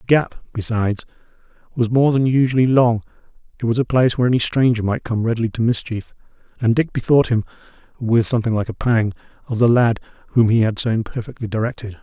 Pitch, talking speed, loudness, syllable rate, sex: 115 Hz, 190 wpm, -19 LUFS, 6.4 syllables/s, male